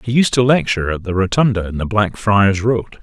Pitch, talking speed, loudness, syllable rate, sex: 105 Hz, 220 wpm, -16 LUFS, 5.5 syllables/s, male